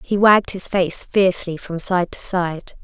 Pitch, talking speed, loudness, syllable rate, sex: 185 Hz, 190 wpm, -19 LUFS, 4.4 syllables/s, female